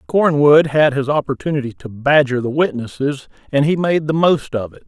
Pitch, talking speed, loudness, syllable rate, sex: 140 Hz, 185 wpm, -16 LUFS, 5.2 syllables/s, male